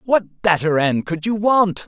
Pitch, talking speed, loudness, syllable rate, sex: 190 Hz, 190 wpm, -18 LUFS, 4.0 syllables/s, male